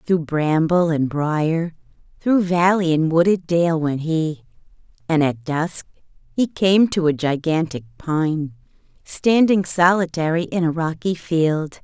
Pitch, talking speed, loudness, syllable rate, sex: 165 Hz, 130 wpm, -19 LUFS, 3.8 syllables/s, female